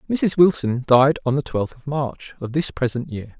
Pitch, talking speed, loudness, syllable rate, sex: 135 Hz, 210 wpm, -20 LUFS, 4.7 syllables/s, male